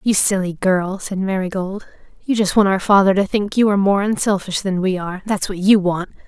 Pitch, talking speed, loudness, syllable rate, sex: 195 Hz, 210 wpm, -18 LUFS, 5.5 syllables/s, female